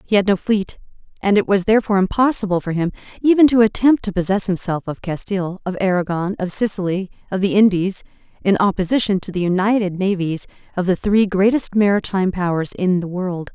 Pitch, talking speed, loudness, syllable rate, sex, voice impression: 195 Hz, 180 wpm, -18 LUFS, 5.9 syllables/s, female, feminine, adult-like, slightly middle-aged, thin, slightly tensed, slightly powerful, bright, hard, slightly clear, fluent, slightly cool, intellectual, slightly refreshing, sincere, calm, slightly friendly, reassuring, slightly unique, slightly elegant, slightly lively, slightly strict, slightly sharp